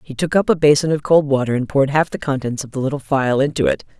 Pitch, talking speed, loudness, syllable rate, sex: 140 Hz, 285 wpm, -17 LUFS, 6.6 syllables/s, female